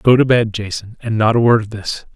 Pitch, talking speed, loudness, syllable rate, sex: 110 Hz, 250 wpm, -16 LUFS, 5.4 syllables/s, male